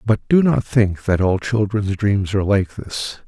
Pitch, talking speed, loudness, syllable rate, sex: 100 Hz, 200 wpm, -18 LUFS, 4.2 syllables/s, male